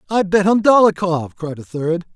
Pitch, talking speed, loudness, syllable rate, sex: 180 Hz, 195 wpm, -16 LUFS, 4.8 syllables/s, male